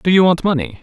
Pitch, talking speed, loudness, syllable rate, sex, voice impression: 175 Hz, 290 wpm, -15 LUFS, 6.3 syllables/s, male, masculine, adult-like, tensed, powerful, bright, clear, intellectual, slightly refreshing, friendly, slightly wild, lively